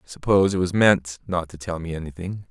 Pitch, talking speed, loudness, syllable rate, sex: 90 Hz, 240 wpm, -22 LUFS, 6.0 syllables/s, male